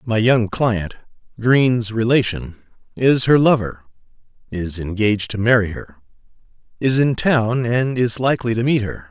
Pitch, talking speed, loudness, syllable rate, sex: 115 Hz, 130 wpm, -18 LUFS, 4.6 syllables/s, male